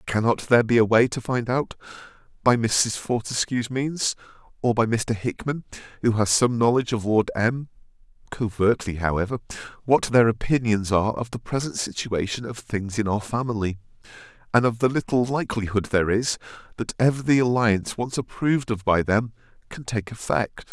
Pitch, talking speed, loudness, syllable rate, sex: 115 Hz, 165 wpm, -23 LUFS, 5.1 syllables/s, male